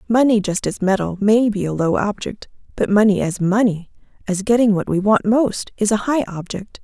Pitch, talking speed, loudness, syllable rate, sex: 205 Hz, 200 wpm, -18 LUFS, 5.1 syllables/s, female